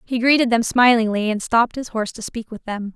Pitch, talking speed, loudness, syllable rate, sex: 230 Hz, 245 wpm, -19 LUFS, 6.0 syllables/s, female